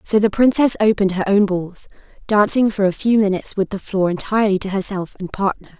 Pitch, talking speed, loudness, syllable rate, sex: 200 Hz, 205 wpm, -17 LUFS, 6.0 syllables/s, female